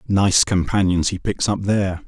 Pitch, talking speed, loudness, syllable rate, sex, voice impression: 95 Hz, 175 wpm, -19 LUFS, 4.7 syllables/s, male, masculine, middle-aged, thick, slightly relaxed, powerful, hard, raspy, intellectual, sincere, calm, mature, wild, lively